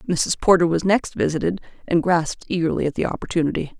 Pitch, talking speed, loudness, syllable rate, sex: 165 Hz, 175 wpm, -21 LUFS, 6.5 syllables/s, female